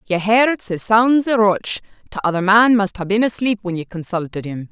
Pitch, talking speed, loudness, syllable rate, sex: 205 Hz, 205 wpm, -17 LUFS, 4.9 syllables/s, female